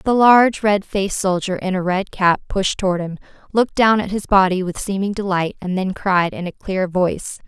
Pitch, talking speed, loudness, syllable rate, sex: 195 Hz, 215 wpm, -18 LUFS, 5.3 syllables/s, female